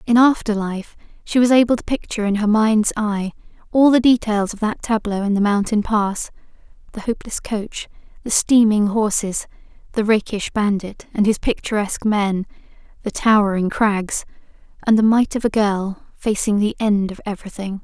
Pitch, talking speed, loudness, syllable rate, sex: 210 Hz, 160 wpm, -19 LUFS, 5.0 syllables/s, female